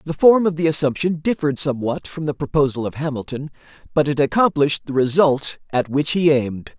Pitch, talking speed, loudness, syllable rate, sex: 145 Hz, 185 wpm, -19 LUFS, 6.0 syllables/s, male